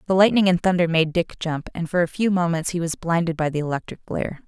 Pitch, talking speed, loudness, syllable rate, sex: 170 Hz, 255 wpm, -22 LUFS, 6.2 syllables/s, female